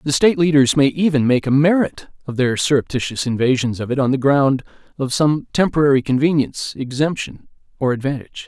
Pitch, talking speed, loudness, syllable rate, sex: 140 Hz, 170 wpm, -18 LUFS, 5.9 syllables/s, male